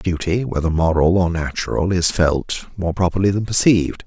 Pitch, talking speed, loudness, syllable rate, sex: 90 Hz, 160 wpm, -18 LUFS, 5.0 syllables/s, male